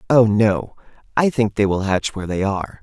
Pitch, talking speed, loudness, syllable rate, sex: 105 Hz, 215 wpm, -19 LUFS, 5.4 syllables/s, male